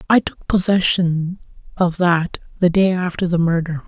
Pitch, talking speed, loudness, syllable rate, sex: 175 Hz, 155 wpm, -18 LUFS, 4.5 syllables/s, male